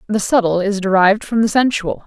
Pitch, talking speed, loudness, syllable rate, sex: 205 Hz, 205 wpm, -15 LUFS, 6.3 syllables/s, female